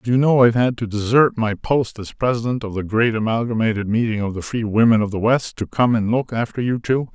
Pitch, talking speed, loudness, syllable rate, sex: 115 Hz, 250 wpm, -19 LUFS, 5.8 syllables/s, male